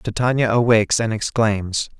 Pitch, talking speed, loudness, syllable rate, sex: 110 Hz, 120 wpm, -18 LUFS, 4.8 syllables/s, male